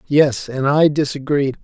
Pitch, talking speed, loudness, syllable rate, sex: 140 Hz, 145 wpm, -17 LUFS, 4.1 syllables/s, male